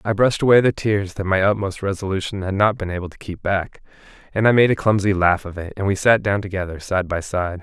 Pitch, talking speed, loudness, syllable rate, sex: 100 Hz, 250 wpm, -20 LUFS, 6.0 syllables/s, male